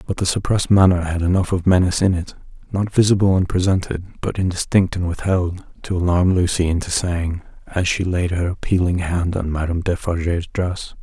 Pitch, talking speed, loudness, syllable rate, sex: 90 Hz, 170 wpm, -19 LUFS, 5.4 syllables/s, male